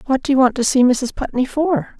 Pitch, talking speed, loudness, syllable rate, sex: 265 Hz, 300 wpm, -17 LUFS, 6.3 syllables/s, female